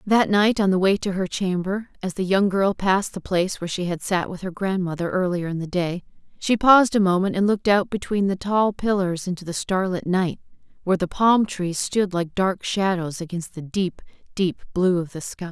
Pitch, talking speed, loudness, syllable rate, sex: 185 Hz, 220 wpm, -22 LUFS, 5.3 syllables/s, female